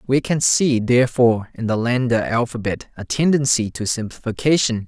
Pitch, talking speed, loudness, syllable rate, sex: 120 Hz, 150 wpm, -19 LUFS, 5.2 syllables/s, male